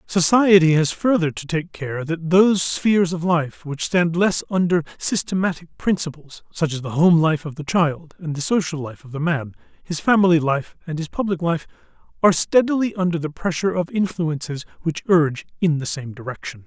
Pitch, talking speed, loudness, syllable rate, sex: 165 Hz, 185 wpm, -20 LUFS, 5.2 syllables/s, male